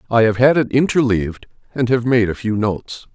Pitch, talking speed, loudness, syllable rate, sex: 115 Hz, 210 wpm, -17 LUFS, 5.6 syllables/s, male